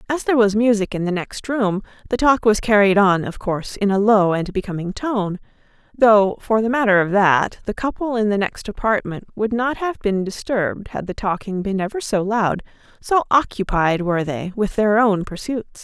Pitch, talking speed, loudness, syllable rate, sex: 210 Hz, 200 wpm, -19 LUFS, 5.0 syllables/s, female